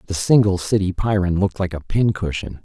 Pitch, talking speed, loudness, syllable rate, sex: 95 Hz, 205 wpm, -19 LUFS, 5.7 syllables/s, male